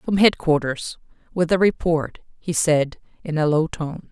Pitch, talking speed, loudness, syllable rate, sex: 165 Hz, 145 wpm, -21 LUFS, 4.3 syllables/s, female